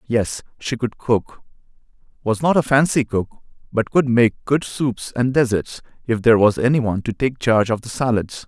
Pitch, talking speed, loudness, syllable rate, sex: 120 Hz, 190 wpm, -19 LUFS, 4.9 syllables/s, male